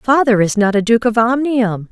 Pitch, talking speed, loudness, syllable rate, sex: 230 Hz, 220 wpm, -14 LUFS, 4.8 syllables/s, female